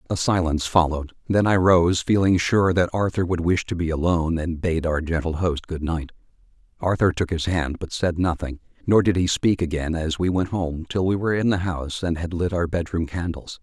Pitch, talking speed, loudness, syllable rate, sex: 85 Hz, 225 wpm, -22 LUFS, 5.4 syllables/s, male